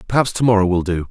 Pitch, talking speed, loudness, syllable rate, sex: 105 Hz, 270 wpm, -17 LUFS, 7.4 syllables/s, male